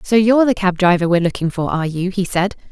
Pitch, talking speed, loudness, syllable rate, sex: 190 Hz, 265 wpm, -16 LUFS, 6.8 syllables/s, female